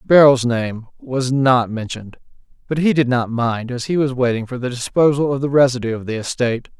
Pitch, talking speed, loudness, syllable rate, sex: 125 Hz, 205 wpm, -18 LUFS, 5.5 syllables/s, male